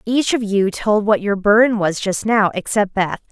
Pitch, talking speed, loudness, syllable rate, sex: 210 Hz, 215 wpm, -17 LUFS, 4.6 syllables/s, female